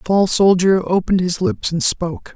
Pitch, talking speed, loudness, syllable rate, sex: 175 Hz, 205 wpm, -16 LUFS, 5.2 syllables/s, male